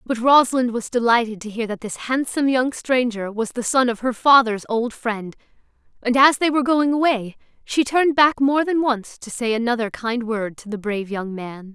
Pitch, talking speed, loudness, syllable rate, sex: 240 Hz, 210 wpm, -20 LUFS, 5.1 syllables/s, female